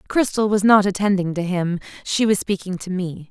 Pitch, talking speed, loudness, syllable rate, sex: 190 Hz, 200 wpm, -20 LUFS, 5.2 syllables/s, female